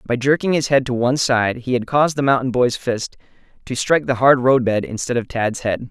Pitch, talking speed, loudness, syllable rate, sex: 125 Hz, 235 wpm, -18 LUFS, 5.6 syllables/s, male